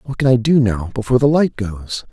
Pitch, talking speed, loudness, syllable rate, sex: 120 Hz, 255 wpm, -16 LUFS, 5.9 syllables/s, male